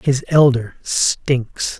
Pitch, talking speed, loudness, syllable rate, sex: 130 Hz, 100 wpm, -17 LUFS, 2.4 syllables/s, male